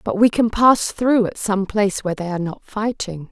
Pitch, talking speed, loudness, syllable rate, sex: 205 Hz, 235 wpm, -19 LUFS, 5.3 syllables/s, female